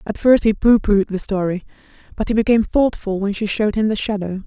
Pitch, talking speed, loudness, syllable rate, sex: 210 Hz, 230 wpm, -18 LUFS, 6.3 syllables/s, female